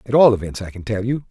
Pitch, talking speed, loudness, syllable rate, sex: 115 Hz, 320 wpm, -19 LUFS, 6.8 syllables/s, male